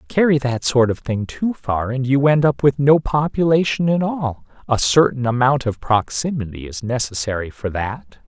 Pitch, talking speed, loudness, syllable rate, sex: 130 Hz, 180 wpm, -19 LUFS, 4.7 syllables/s, male